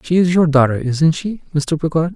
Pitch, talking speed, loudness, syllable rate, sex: 160 Hz, 225 wpm, -16 LUFS, 5.7 syllables/s, male